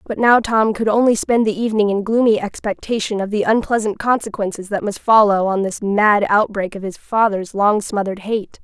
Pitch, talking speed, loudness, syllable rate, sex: 210 Hz, 195 wpm, -17 LUFS, 5.3 syllables/s, female